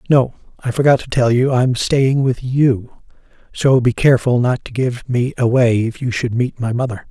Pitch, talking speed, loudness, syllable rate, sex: 125 Hz, 195 wpm, -16 LUFS, 4.6 syllables/s, male